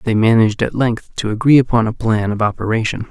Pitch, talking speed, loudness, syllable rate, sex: 115 Hz, 210 wpm, -16 LUFS, 6.0 syllables/s, male